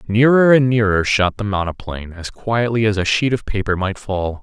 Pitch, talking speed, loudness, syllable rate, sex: 105 Hz, 205 wpm, -17 LUFS, 5.2 syllables/s, male